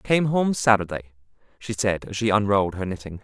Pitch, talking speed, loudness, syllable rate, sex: 105 Hz, 205 wpm, -23 LUFS, 6.3 syllables/s, male